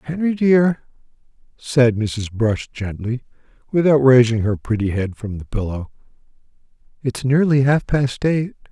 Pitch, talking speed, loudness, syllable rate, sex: 125 Hz, 130 wpm, -19 LUFS, 4.3 syllables/s, male